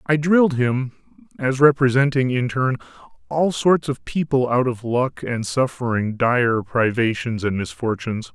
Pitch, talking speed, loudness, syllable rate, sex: 125 Hz, 145 wpm, -20 LUFS, 4.4 syllables/s, male